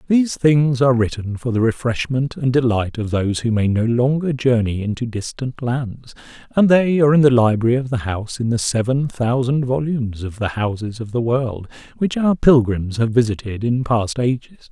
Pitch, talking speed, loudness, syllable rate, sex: 125 Hz, 190 wpm, -18 LUFS, 5.2 syllables/s, male